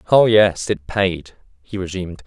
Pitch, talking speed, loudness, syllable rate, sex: 95 Hz, 160 wpm, -18 LUFS, 4.5 syllables/s, male